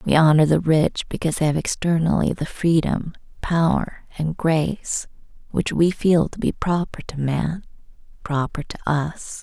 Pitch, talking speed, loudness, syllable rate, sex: 160 Hz, 155 wpm, -21 LUFS, 4.5 syllables/s, female